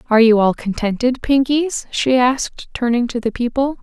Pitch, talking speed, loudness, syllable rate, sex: 245 Hz, 170 wpm, -17 LUFS, 5.1 syllables/s, female